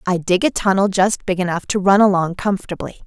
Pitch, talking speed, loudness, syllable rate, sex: 190 Hz, 215 wpm, -17 LUFS, 6.1 syllables/s, female